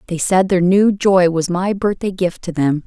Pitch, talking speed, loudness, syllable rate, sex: 180 Hz, 230 wpm, -16 LUFS, 4.5 syllables/s, female